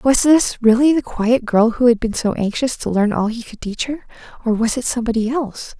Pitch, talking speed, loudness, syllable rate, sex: 235 Hz, 240 wpm, -17 LUFS, 5.5 syllables/s, female